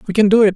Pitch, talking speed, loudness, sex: 205 Hz, 435 wpm, -13 LUFS, male